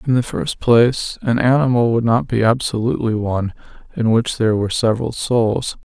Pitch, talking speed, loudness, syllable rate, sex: 115 Hz, 170 wpm, -17 LUFS, 5.6 syllables/s, male